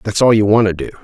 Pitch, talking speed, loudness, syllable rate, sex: 105 Hz, 350 wpm, -13 LUFS, 7.6 syllables/s, male